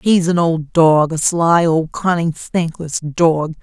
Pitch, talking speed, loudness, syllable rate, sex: 165 Hz, 165 wpm, -16 LUFS, 3.4 syllables/s, female